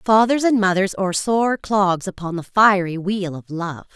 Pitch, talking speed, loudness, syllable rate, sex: 195 Hz, 180 wpm, -19 LUFS, 4.4 syllables/s, female